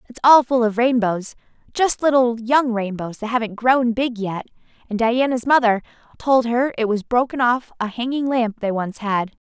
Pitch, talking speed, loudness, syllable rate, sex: 235 Hz, 170 wpm, -19 LUFS, 4.7 syllables/s, female